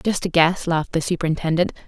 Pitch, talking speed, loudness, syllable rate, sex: 170 Hz, 190 wpm, -20 LUFS, 6.6 syllables/s, female